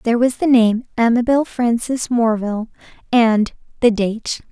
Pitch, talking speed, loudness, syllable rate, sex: 235 Hz, 135 wpm, -17 LUFS, 4.6 syllables/s, female